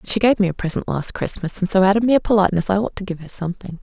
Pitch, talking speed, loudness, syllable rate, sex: 195 Hz, 315 wpm, -19 LUFS, 7.4 syllables/s, female